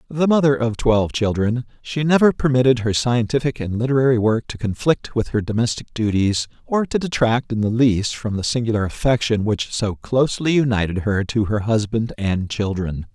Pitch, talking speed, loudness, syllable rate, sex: 115 Hz, 180 wpm, -20 LUFS, 5.2 syllables/s, male